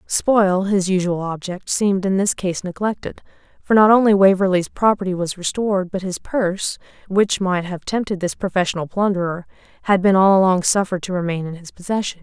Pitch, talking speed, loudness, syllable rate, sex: 190 Hz, 175 wpm, -19 LUFS, 5.5 syllables/s, female